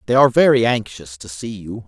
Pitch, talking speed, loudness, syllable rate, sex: 110 Hz, 225 wpm, -15 LUFS, 5.9 syllables/s, male